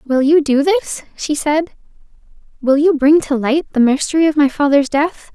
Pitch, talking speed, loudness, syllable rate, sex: 295 Hz, 190 wpm, -15 LUFS, 4.8 syllables/s, female